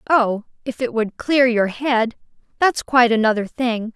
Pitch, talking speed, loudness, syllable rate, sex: 240 Hz, 165 wpm, -19 LUFS, 4.5 syllables/s, female